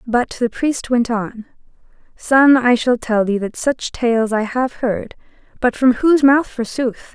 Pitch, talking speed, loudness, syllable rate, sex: 245 Hz, 175 wpm, -17 LUFS, 3.9 syllables/s, female